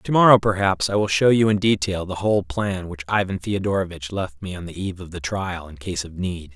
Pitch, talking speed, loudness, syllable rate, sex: 95 Hz, 245 wpm, -22 LUFS, 5.6 syllables/s, male